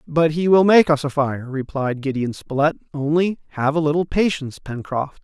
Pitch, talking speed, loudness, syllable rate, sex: 150 Hz, 185 wpm, -20 LUFS, 5.1 syllables/s, male